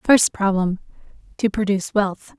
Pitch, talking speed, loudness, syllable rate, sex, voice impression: 205 Hz, 125 wpm, -20 LUFS, 4.7 syllables/s, female, very feminine, young, slightly adult-like, very thin, slightly tensed, slightly weak, very bright, soft, very clear, fluent, very cute, intellectual, very refreshing, sincere, very calm, very friendly, very reassuring, very unique, very elegant, slightly wild, very sweet, lively, very kind, slightly sharp, slightly modest, very light